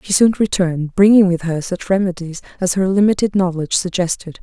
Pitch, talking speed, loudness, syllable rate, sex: 185 Hz, 175 wpm, -16 LUFS, 5.9 syllables/s, female